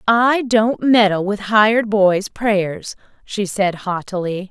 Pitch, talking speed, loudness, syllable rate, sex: 205 Hz, 135 wpm, -17 LUFS, 3.5 syllables/s, female